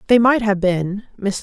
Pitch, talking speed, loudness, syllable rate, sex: 205 Hz, 170 wpm, -18 LUFS, 4.4 syllables/s, female